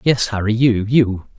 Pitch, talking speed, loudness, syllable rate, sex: 115 Hz, 175 wpm, -17 LUFS, 4.2 syllables/s, male